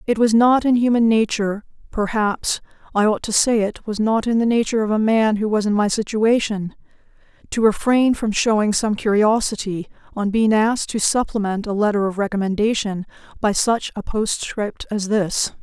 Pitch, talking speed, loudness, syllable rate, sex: 215 Hz, 170 wpm, -19 LUFS, 5.1 syllables/s, female